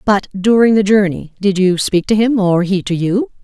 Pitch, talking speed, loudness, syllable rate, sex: 200 Hz, 225 wpm, -14 LUFS, 4.8 syllables/s, female